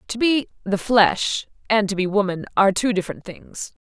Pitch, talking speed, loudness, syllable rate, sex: 205 Hz, 190 wpm, -20 LUFS, 5.1 syllables/s, female